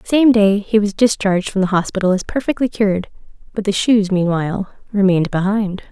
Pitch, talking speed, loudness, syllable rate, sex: 200 Hz, 185 wpm, -17 LUFS, 5.8 syllables/s, female